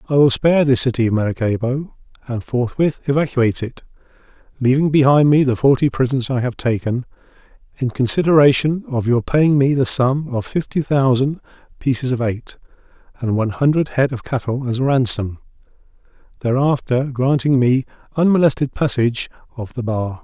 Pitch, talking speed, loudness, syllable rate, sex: 130 Hz, 150 wpm, -18 LUFS, 5.4 syllables/s, male